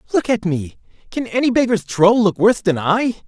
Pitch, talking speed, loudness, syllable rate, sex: 205 Hz, 200 wpm, -17 LUFS, 5.5 syllables/s, male